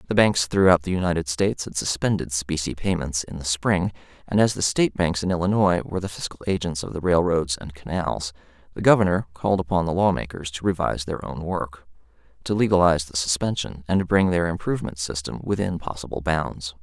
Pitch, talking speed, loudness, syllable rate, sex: 85 Hz, 190 wpm, -23 LUFS, 5.9 syllables/s, male